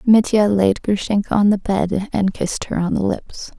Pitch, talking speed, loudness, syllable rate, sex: 200 Hz, 200 wpm, -18 LUFS, 4.7 syllables/s, female